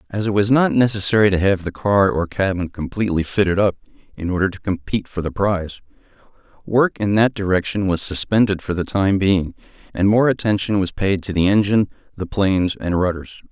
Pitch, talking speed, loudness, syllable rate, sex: 95 Hz, 190 wpm, -19 LUFS, 5.8 syllables/s, male